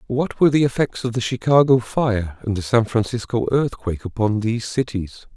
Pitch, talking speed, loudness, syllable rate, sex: 115 Hz, 180 wpm, -20 LUFS, 5.3 syllables/s, male